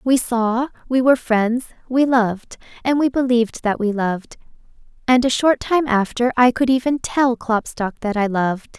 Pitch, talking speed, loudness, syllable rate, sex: 240 Hz, 180 wpm, -18 LUFS, 4.8 syllables/s, female